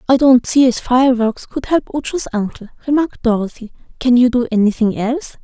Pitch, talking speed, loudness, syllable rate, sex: 250 Hz, 175 wpm, -15 LUFS, 5.9 syllables/s, female